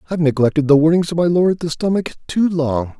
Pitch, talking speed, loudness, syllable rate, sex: 160 Hz, 220 wpm, -17 LUFS, 6.0 syllables/s, male